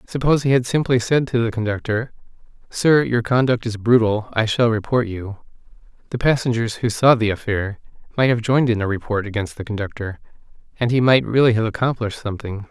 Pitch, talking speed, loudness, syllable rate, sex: 115 Hz, 185 wpm, -19 LUFS, 5.9 syllables/s, male